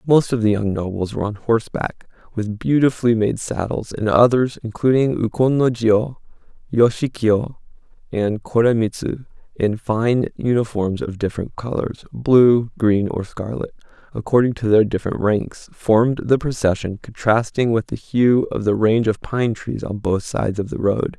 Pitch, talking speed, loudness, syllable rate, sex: 115 Hz, 155 wpm, -19 LUFS, 4.6 syllables/s, male